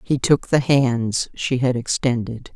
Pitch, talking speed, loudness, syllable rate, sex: 125 Hz, 165 wpm, -20 LUFS, 3.8 syllables/s, female